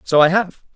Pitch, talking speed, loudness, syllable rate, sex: 175 Hz, 240 wpm, -16 LUFS, 5.4 syllables/s, male